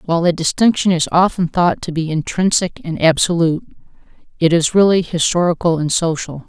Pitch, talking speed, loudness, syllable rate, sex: 170 Hz, 155 wpm, -16 LUFS, 5.6 syllables/s, female